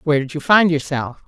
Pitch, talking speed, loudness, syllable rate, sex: 150 Hz, 235 wpm, -17 LUFS, 6.0 syllables/s, female